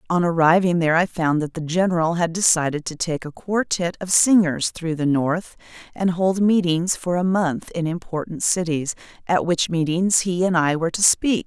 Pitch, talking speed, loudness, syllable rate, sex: 170 Hz, 195 wpm, -20 LUFS, 5.0 syllables/s, female